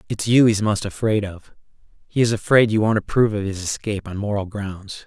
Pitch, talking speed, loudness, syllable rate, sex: 105 Hz, 215 wpm, -20 LUFS, 5.7 syllables/s, male